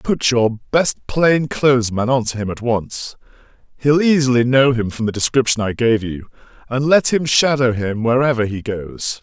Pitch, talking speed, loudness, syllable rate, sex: 125 Hz, 170 wpm, -17 LUFS, 4.6 syllables/s, male